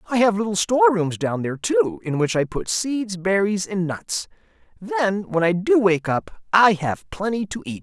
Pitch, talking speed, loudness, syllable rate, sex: 190 Hz, 200 wpm, -21 LUFS, 4.6 syllables/s, male